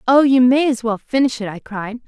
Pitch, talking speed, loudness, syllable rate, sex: 245 Hz, 260 wpm, -17 LUFS, 5.3 syllables/s, female